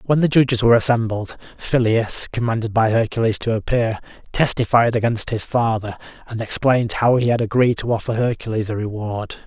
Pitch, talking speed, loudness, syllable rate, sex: 115 Hz, 165 wpm, -19 LUFS, 5.5 syllables/s, male